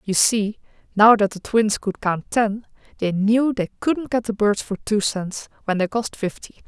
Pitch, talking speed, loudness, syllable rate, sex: 215 Hz, 205 wpm, -21 LUFS, 4.3 syllables/s, female